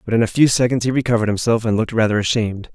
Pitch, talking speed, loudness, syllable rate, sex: 115 Hz, 260 wpm, -18 LUFS, 7.9 syllables/s, male